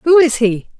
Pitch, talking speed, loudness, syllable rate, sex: 265 Hz, 225 wpm, -13 LUFS, 4.4 syllables/s, female